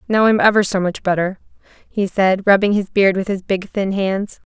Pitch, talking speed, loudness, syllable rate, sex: 195 Hz, 215 wpm, -17 LUFS, 4.9 syllables/s, female